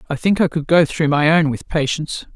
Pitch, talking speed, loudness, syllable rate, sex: 155 Hz, 255 wpm, -17 LUFS, 5.8 syllables/s, female